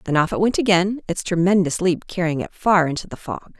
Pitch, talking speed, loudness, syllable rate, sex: 180 Hz, 235 wpm, -20 LUFS, 5.6 syllables/s, female